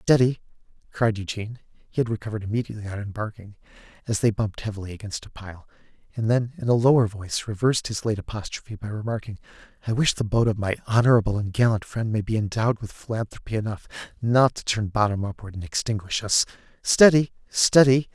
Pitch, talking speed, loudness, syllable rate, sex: 110 Hz, 180 wpm, -24 LUFS, 4.0 syllables/s, male